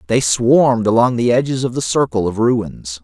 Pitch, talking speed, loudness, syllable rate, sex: 115 Hz, 200 wpm, -15 LUFS, 4.9 syllables/s, male